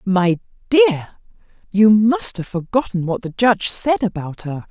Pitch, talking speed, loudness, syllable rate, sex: 205 Hz, 155 wpm, -18 LUFS, 4.7 syllables/s, female